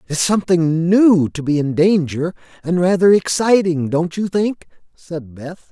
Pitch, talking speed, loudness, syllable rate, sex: 170 Hz, 155 wpm, -16 LUFS, 4.2 syllables/s, male